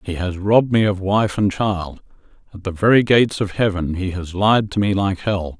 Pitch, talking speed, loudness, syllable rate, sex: 100 Hz, 225 wpm, -18 LUFS, 5.0 syllables/s, male